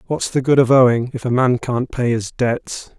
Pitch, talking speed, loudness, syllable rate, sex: 125 Hz, 240 wpm, -17 LUFS, 4.7 syllables/s, male